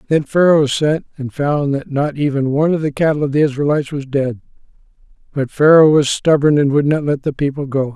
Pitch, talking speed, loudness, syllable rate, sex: 145 Hz, 210 wpm, -15 LUFS, 5.7 syllables/s, male